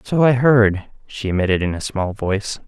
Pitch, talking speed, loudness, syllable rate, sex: 105 Hz, 200 wpm, -18 LUFS, 5.0 syllables/s, male